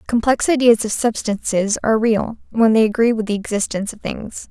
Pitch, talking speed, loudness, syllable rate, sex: 220 Hz, 185 wpm, -18 LUFS, 5.5 syllables/s, female